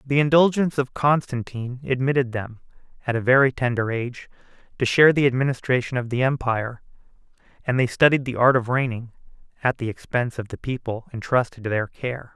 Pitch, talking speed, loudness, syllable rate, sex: 125 Hz, 170 wpm, -22 LUFS, 6.1 syllables/s, male